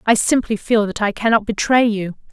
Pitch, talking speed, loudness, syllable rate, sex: 215 Hz, 205 wpm, -17 LUFS, 5.3 syllables/s, female